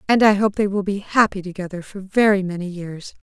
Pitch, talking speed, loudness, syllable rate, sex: 195 Hz, 220 wpm, -20 LUFS, 5.7 syllables/s, female